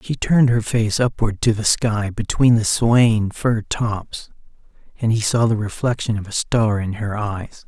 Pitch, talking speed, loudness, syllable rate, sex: 110 Hz, 190 wpm, -19 LUFS, 4.3 syllables/s, male